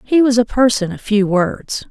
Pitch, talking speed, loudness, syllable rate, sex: 225 Hz, 220 wpm, -16 LUFS, 4.4 syllables/s, female